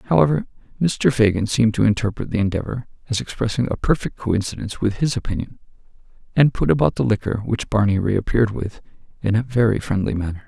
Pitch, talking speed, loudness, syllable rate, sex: 110 Hz, 170 wpm, -21 LUFS, 6.2 syllables/s, male